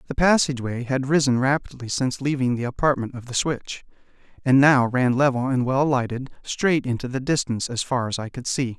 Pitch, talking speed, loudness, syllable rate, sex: 130 Hz, 200 wpm, -22 LUFS, 5.6 syllables/s, male